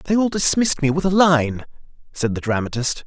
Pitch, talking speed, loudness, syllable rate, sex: 155 Hz, 195 wpm, -19 LUFS, 5.7 syllables/s, male